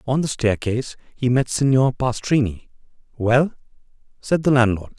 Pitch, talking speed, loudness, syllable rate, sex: 125 Hz, 130 wpm, -20 LUFS, 5.0 syllables/s, male